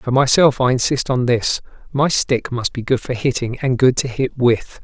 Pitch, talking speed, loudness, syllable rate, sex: 125 Hz, 210 wpm, -17 LUFS, 4.7 syllables/s, male